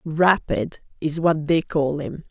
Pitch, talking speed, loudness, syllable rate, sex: 160 Hz, 155 wpm, -22 LUFS, 3.6 syllables/s, female